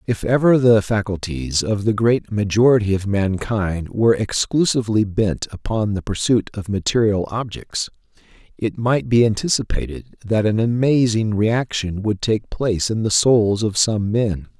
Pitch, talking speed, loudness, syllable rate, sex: 105 Hz, 150 wpm, -19 LUFS, 4.5 syllables/s, male